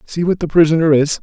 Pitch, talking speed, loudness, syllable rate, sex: 160 Hz, 245 wpm, -14 LUFS, 6.2 syllables/s, male